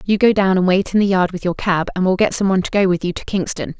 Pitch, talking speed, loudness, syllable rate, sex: 190 Hz, 350 wpm, -17 LUFS, 6.7 syllables/s, female